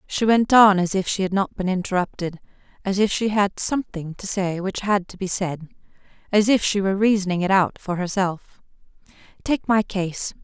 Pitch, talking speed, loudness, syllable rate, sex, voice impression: 195 Hz, 195 wpm, -21 LUFS, 5.2 syllables/s, female, feminine, adult-like, tensed, powerful, clear, fluent, intellectual, elegant, strict, slightly intense, sharp